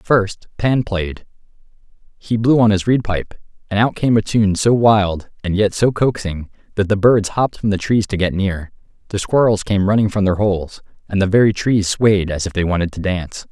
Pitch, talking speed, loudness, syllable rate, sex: 100 Hz, 215 wpm, -17 LUFS, 5.1 syllables/s, male